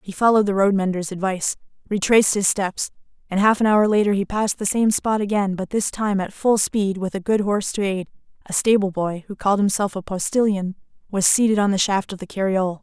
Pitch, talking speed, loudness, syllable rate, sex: 200 Hz, 225 wpm, -20 LUFS, 5.9 syllables/s, female